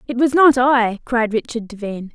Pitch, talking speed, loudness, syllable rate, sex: 240 Hz, 195 wpm, -17 LUFS, 5.2 syllables/s, female